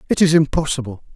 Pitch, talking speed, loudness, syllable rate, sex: 140 Hz, 155 wpm, -17 LUFS, 6.9 syllables/s, male